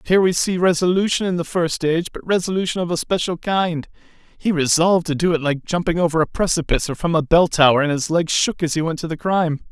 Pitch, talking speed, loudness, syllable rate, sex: 170 Hz, 240 wpm, -19 LUFS, 6.3 syllables/s, male